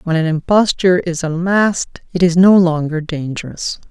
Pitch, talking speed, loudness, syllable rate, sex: 170 Hz, 155 wpm, -15 LUFS, 4.9 syllables/s, female